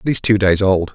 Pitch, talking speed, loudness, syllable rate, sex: 100 Hz, 445 wpm, -15 LUFS, 8.2 syllables/s, male